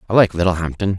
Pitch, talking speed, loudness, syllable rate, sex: 90 Hz, 185 wpm, -18 LUFS, 7.4 syllables/s, male